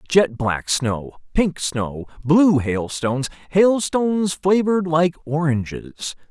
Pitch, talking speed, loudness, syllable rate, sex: 155 Hz, 75 wpm, -20 LUFS, 3.5 syllables/s, male